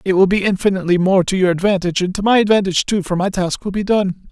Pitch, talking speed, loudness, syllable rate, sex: 190 Hz, 265 wpm, -16 LUFS, 6.9 syllables/s, male